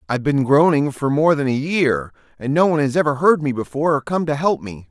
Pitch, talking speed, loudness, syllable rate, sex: 140 Hz, 255 wpm, -18 LUFS, 6.0 syllables/s, male